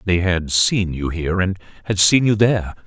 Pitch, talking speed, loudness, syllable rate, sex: 95 Hz, 210 wpm, -18 LUFS, 5.1 syllables/s, male